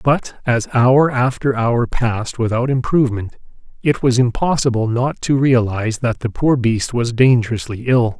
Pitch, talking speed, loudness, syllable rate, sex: 125 Hz, 155 wpm, -17 LUFS, 4.7 syllables/s, male